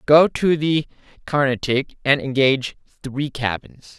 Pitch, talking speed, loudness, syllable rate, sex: 140 Hz, 120 wpm, -20 LUFS, 3.9 syllables/s, male